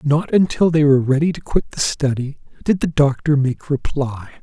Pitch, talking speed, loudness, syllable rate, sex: 145 Hz, 190 wpm, -18 LUFS, 5.0 syllables/s, male